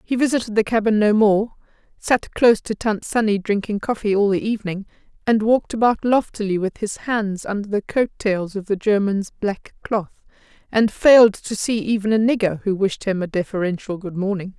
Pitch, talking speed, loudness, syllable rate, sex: 210 Hz, 190 wpm, -20 LUFS, 5.3 syllables/s, female